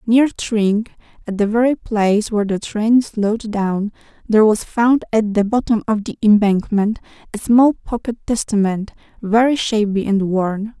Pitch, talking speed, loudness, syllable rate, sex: 215 Hz, 155 wpm, -17 LUFS, 4.6 syllables/s, female